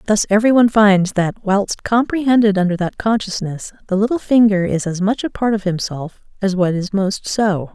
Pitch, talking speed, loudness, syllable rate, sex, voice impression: 200 Hz, 195 wpm, -17 LUFS, 5.1 syllables/s, female, feminine, gender-neutral, slightly young, adult-like, slightly middle-aged, tensed, slightly clear, fluent, slightly cute, cool, very intellectual, sincere, calm, slightly reassuring, slightly elegant, slightly sharp